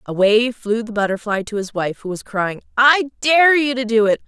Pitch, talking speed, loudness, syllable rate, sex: 230 Hz, 225 wpm, -17 LUFS, 4.9 syllables/s, female